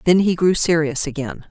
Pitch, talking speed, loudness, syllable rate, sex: 165 Hz, 200 wpm, -18 LUFS, 5.3 syllables/s, female